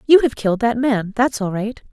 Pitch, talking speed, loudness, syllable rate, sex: 230 Hz, 250 wpm, -18 LUFS, 5.6 syllables/s, female